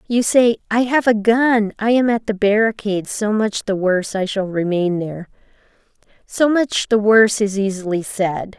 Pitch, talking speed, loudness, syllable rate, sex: 210 Hz, 180 wpm, -17 LUFS, 4.8 syllables/s, female